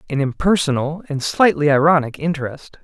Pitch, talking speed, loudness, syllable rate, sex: 150 Hz, 125 wpm, -18 LUFS, 5.4 syllables/s, male